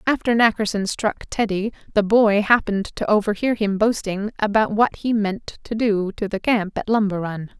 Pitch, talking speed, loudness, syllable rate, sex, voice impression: 210 Hz, 180 wpm, -20 LUFS, 4.8 syllables/s, female, feminine, adult-like, slightly soft, fluent, calm, reassuring, slightly kind